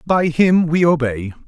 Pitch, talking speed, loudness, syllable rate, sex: 155 Hz, 165 wpm, -16 LUFS, 4.0 syllables/s, male